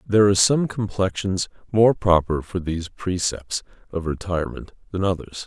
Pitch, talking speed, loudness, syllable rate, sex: 95 Hz, 145 wpm, -22 LUFS, 5.2 syllables/s, male